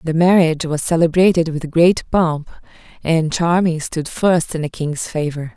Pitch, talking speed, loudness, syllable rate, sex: 165 Hz, 160 wpm, -17 LUFS, 4.6 syllables/s, female